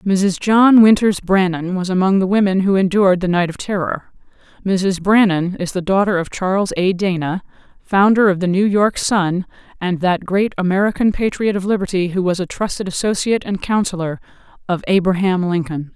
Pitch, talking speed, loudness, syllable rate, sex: 190 Hz, 175 wpm, -17 LUFS, 5.2 syllables/s, female